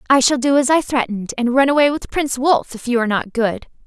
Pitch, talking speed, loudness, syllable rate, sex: 255 Hz, 265 wpm, -17 LUFS, 6.4 syllables/s, female